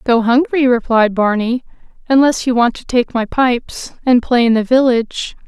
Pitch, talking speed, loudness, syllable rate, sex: 245 Hz, 175 wpm, -14 LUFS, 4.8 syllables/s, female